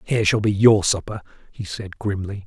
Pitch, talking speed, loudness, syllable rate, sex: 100 Hz, 195 wpm, -20 LUFS, 5.3 syllables/s, male